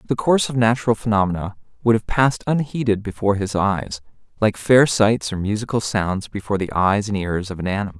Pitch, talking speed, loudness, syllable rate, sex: 105 Hz, 195 wpm, -20 LUFS, 6.1 syllables/s, male